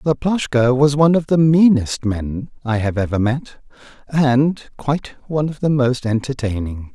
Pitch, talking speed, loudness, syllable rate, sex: 130 Hz, 155 wpm, -18 LUFS, 4.7 syllables/s, male